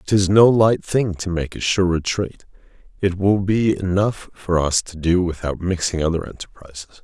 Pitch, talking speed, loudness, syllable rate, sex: 90 Hz, 180 wpm, -19 LUFS, 4.7 syllables/s, male